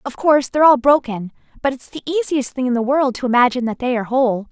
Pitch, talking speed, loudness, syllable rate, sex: 260 Hz, 255 wpm, -17 LUFS, 6.9 syllables/s, female